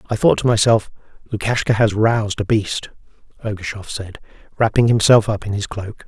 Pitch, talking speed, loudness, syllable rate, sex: 105 Hz, 170 wpm, -18 LUFS, 5.4 syllables/s, male